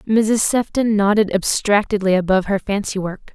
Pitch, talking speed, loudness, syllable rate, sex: 205 Hz, 125 wpm, -18 LUFS, 5.0 syllables/s, female